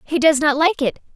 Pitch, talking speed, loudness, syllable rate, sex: 295 Hz, 260 wpm, -17 LUFS, 5.5 syllables/s, female